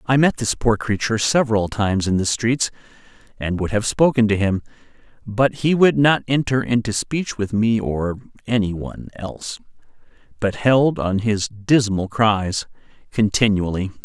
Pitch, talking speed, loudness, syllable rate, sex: 110 Hz, 155 wpm, -19 LUFS, 4.7 syllables/s, male